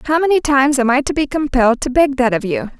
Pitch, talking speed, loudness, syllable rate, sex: 270 Hz, 280 wpm, -15 LUFS, 6.6 syllables/s, female